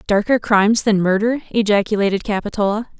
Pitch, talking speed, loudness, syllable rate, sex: 210 Hz, 120 wpm, -17 LUFS, 6.1 syllables/s, female